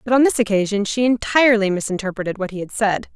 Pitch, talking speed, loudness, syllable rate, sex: 215 Hz, 210 wpm, -19 LUFS, 6.6 syllables/s, female